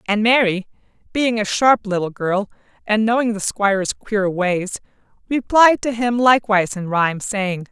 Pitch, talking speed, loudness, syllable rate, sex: 210 Hz, 155 wpm, -18 LUFS, 4.7 syllables/s, female